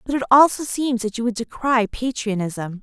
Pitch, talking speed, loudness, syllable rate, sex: 235 Hz, 190 wpm, -20 LUFS, 4.8 syllables/s, female